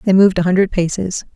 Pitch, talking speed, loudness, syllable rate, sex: 185 Hz, 220 wpm, -15 LUFS, 6.8 syllables/s, female